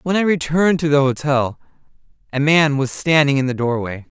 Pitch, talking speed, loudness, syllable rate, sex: 145 Hz, 185 wpm, -17 LUFS, 5.5 syllables/s, male